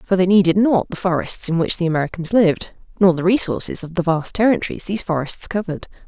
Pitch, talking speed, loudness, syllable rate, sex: 180 Hz, 210 wpm, -18 LUFS, 6.5 syllables/s, female